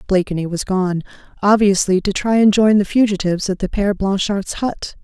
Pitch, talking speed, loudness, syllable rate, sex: 195 Hz, 180 wpm, -17 LUFS, 5.4 syllables/s, female